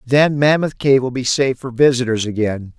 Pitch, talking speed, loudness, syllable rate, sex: 130 Hz, 195 wpm, -16 LUFS, 5.3 syllables/s, male